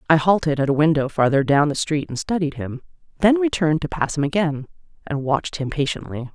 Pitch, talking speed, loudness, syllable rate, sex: 155 Hz, 210 wpm, -20 LUFS, 5.9 syllables/s, female